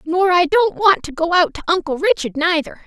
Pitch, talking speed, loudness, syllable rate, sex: 345 Hz, 230 wpm, -16 LUFS, 5.3 syllables/s, female